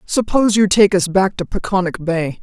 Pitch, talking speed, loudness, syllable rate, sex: 190 Hz, 200 wpm, -16 LUFS, 5.2 syllables/s, female